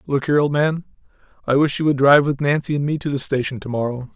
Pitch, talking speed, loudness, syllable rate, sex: 140 Hz, 245 wpm, -19 LUFS, 6.8 syllables/s, male